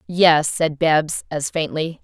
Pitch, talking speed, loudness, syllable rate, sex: 155 Hz, 150 wpm, -19 LUFS, 3.3 syllables/s, female